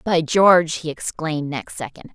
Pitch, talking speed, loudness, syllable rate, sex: 160 Hz, 170 wpm, -19 LUFS, 5.0 syllables/s, female